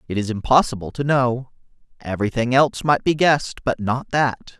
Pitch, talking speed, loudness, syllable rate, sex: 125 Hz, 170 wpm, -20 LUFS, 5.4 syllables/s, male